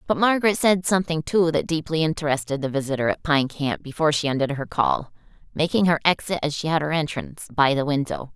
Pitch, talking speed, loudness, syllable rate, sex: 155 Hz, 210 wpm, -22 LUFS, 6.2 syllables/s, female